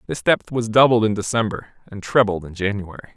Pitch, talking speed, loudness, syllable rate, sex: 110 Hz, 190 wpm, -19 LUFS, 5.8 syllables/s, male